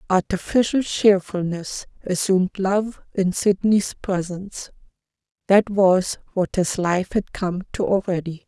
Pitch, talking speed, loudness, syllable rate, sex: 190 Hz, 105 wpm, -21 LUFS, 4.1 syllables/s, female